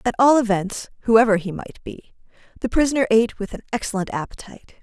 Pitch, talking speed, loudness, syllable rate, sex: 220 Hz, 175 wpm, -20 LUFS, 6.3 syllables/s, female